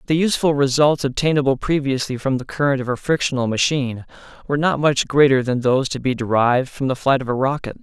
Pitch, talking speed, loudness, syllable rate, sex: 135 Hz, 205 wpm, -19 LUFS, 6.4 syllables/s, male